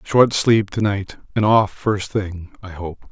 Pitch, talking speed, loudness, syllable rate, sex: 100 Hz, 195 wpm, -18 LUFS, 3.7 syllables/s, male